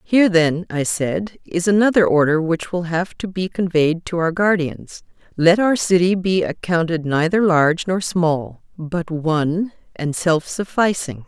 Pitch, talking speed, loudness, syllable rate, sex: 175 Hz, 160 wpm, -18 LUFS, 4.2 syllables/s, female